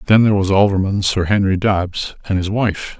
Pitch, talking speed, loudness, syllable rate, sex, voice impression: 100 Hz, 200 wpm, -17 LUFS, 5.2 syllables/s, male, very masculine, very adult-like, old, very thick, very tensed, very powerful, slightly bright, soft, muffled, very fluent, raspy, very cool, intellectual, sincere, very calm, very mature, very friendly, very reassuring, very unique, elegant, very wild, sweet, lively, very kind, slightly intense